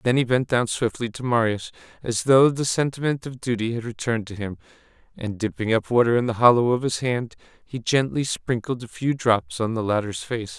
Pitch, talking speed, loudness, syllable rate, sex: 120 Hz, 210 wpm, -23 LUFS, 5.4 syllables/s, male